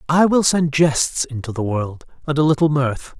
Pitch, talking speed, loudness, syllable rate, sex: 145 Hz, 205 wpm, -18 LUFS, 4.7 syllables/s, male